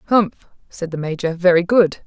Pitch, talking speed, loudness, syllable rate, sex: 180 Hz, 175 wpm, -18 LUFS, 5.4 syllables/s, female